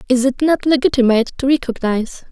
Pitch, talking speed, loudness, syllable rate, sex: 260 Hz, 155 wpm, -16 LUFS, 6.6 syllables/s, female